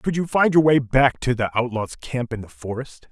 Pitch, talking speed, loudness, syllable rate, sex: 130 Hz, 250 wpm, -21 LUFS, 5.0 syllables/s, male